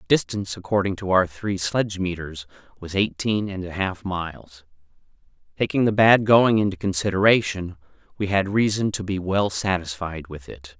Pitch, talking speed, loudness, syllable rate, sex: 95 Hz, 160 wpm, -22 LUFS, 5.1 syllables/s, male